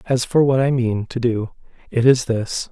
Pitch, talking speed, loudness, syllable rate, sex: 125 Hz, 200 wpm, -19 LUFS, 4.6 syllables/s, male